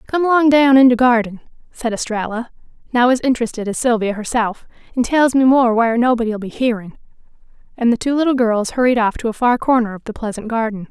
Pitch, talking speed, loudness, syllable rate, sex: 240 Hz, 205 wpm, -16 LUFS, 5.9 syllables/s, female